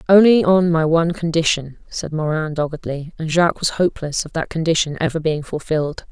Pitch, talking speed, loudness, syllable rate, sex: 160 Hz, 175 wpm, -19 LUFS, 5.7 syllables/s, female